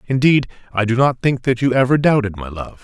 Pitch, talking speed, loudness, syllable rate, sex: 125 Hz, 235 wpm, -17 LUFS, 5.9 syllables/s, male